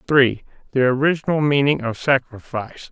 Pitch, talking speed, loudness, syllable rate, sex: 135 Hz, 125 wpm, -19 LUFS, 5.9 syllables/s, male